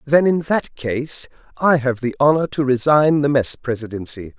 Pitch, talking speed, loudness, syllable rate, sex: 140 Hz, 180 wpm, -18 LUFS, 4.6 syllables/s, male